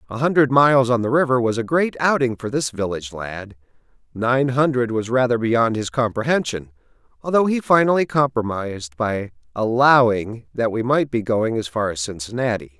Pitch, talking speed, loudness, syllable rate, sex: 120 Hz, 170 wpm, -20 LUFS, 5.2 syllables/s, male